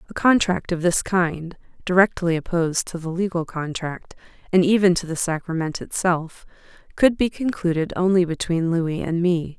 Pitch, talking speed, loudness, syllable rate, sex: 175 Hz, 155 wpm, -21 LUFS, 4.8 syllables/s, female